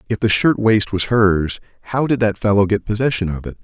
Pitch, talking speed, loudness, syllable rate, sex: 105 Hz, 215 wpm, -17 LUFS, 5.5 syllables/s, male